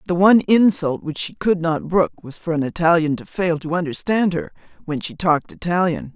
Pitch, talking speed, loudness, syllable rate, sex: 170 Hz, 205 wpm, -19 LUFS, 5.4 syllables/s, female